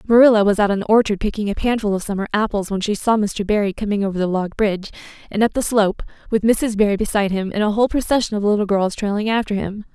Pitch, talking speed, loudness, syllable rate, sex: 210 Hz, 245 wpm, -19 LUFS, 6.9 syllables/s, female